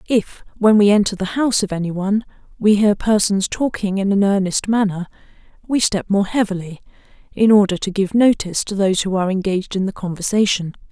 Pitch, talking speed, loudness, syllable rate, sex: 200 Hz, 185 wpm, -18 LUFS, 6.0 syllables/s, female